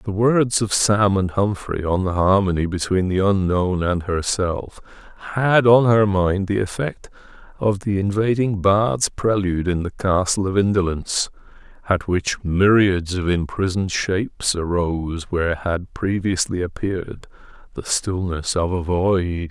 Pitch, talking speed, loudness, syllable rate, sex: 95 Hz, 140 wpm, -20 LUFS, 4.3 syllables/s, male